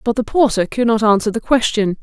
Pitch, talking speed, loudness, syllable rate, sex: 225 Hz, 235 wpm, -16 LUFS, 5.7 syllables/s, female